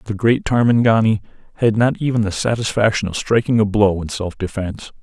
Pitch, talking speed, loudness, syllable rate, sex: 105 Hz, 180 wpm, -18 LUFS, 5.7 syllables/s, male